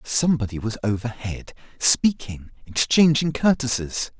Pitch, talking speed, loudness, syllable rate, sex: 125 Hz, 70 wpm, -21 LUFS, 4.5 syllables/s, male